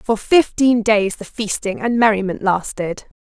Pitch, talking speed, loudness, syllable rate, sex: 215 Hz, 150 wpm, -17 LUFS, 4.2 syllables/s, female